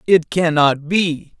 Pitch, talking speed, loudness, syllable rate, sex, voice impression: 165 Hz, 130 wpm, -16 LUFS, 3.2 syllables/s, male, very masculine, very adult-like, slightly middle-aged, very thick, tensed, powerful, very cool, intellectual, very sincere, very calm, very mature, friendly, reassuring, unique, elegant, very wild, lively, kind